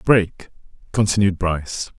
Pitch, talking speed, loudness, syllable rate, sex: 95 Hz, 90 wpm, -20 LUFS, 5.0 syllables/s, male